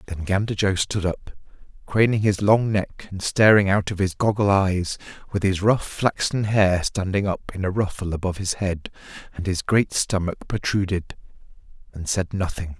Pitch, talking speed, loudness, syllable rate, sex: 95 Hz, 175 wpm, -22 LUFS, 4.8 syllables/s, male